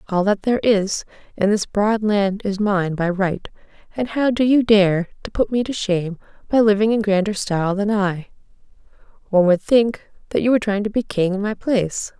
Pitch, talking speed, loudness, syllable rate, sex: 205 Hz, 205 wpm, -19 LUFS, 5.3 syllables/s, female